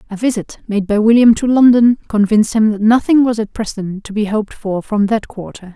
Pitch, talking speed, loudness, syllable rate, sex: 215 Hz, 220 wpm, -14 LUFS, 5.6 syllables/s, female